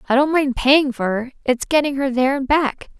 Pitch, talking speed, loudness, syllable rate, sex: 270 Hz, 240 wpm, -18 LUFS, 5.3 syllables/s, female